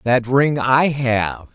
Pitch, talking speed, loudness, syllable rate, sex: 125 Hz, 155 wpm, -17 LUFS, 2.9 syllables/s, male